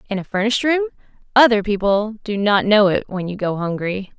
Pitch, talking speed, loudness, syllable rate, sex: 210 Hz, 200 wpm, -18 LUFS, 5.7 syllables/s, female